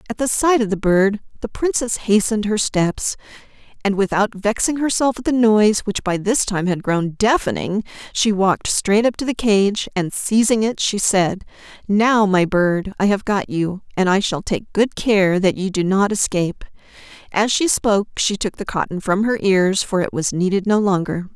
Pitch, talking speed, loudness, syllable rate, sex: 205 Hz, 200 wpm, -18 LUFS, 4.7 syllables/s, female